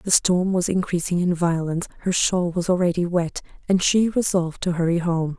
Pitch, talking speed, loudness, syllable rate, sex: 175 Hz, 190 wpm, -22 LUFS, 5.3 syllables/s, female